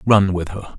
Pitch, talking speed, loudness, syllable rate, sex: 95 Hz, 230 wpm, -18 LUFS, 5.7 syllables/s, male